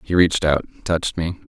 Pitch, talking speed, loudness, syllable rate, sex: 85 Hz, 200 wpm, -20 LUFS, 6.1 syllables/s, male